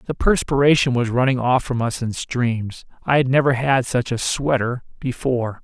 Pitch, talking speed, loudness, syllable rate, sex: 125 Hz, 170 wpm, -20 LUFS, 4.8 syllables/s, male